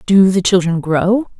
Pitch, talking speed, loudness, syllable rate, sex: 190 Hz, 170 wpm, -14 LUFS, 4.1 syllables/s, female